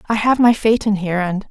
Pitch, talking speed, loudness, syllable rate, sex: 210 Hz, 240 wpm, -16 LUFS, 6.3 syllables/s, female